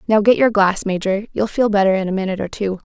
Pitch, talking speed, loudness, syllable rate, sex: 200 Hz, 270 wpm, -17 LUFS, 6.6 syllables/s, female